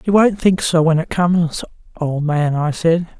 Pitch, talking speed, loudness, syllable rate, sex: 165 Hz, 205 wpm, -17 LUFS, 4.5 syllables/s, female